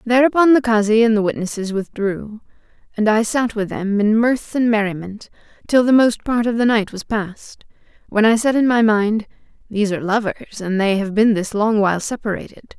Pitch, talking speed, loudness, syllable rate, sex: 220 Hz, 195 wpm, -17 LUFS, 5.4 syllables/s, female